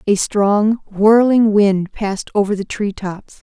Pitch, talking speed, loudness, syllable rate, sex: 205 Hz, 155 wpm, -15 LUFS, 3.8 syllables/s, female